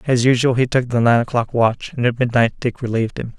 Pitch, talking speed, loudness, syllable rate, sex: 120 Hz, 250 wpm, -18 LUFS, 6.0 syllables/s, male